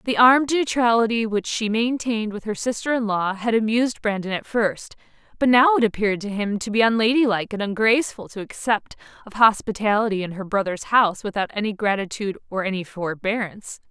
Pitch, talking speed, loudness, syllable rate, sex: 215 Hz, 175 wpm, -21 LUFS, 5.9 syllables/s, female